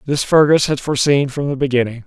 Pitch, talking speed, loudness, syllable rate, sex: 140 Hz, 205 wpm, -16 LUFS, 6.3 syllables/s, male